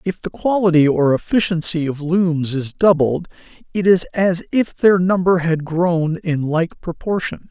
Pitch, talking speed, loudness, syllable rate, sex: 170 Hz, 160 wpm, -17 LUFS, 4.3 syllables/s, male